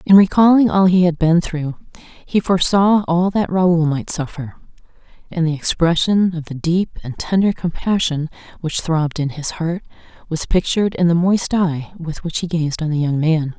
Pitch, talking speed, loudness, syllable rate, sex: 170 Hz, 185 wpm, -17 LUFS, 4.7 syllables/s, female